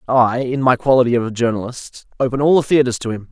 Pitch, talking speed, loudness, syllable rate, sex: 125 Hz, 215 wpm, -16 LUFS, 6.0 syllables/s, male